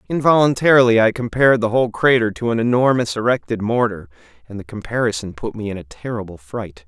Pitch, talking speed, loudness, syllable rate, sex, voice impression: 110 Hz, 175 wpm, -18 LUFS, 6.2 syllables/s, male, masculine, adult-like, tensed, powerful, slightly bright, clear, fluent, cool, intellectual, friendly, wild, lively, slightly light